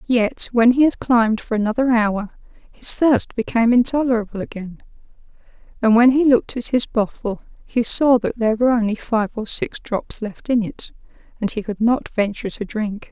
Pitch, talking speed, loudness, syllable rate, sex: 230 Hz, 185 wpm, -19 LUFS, 5.2 syllables/s, female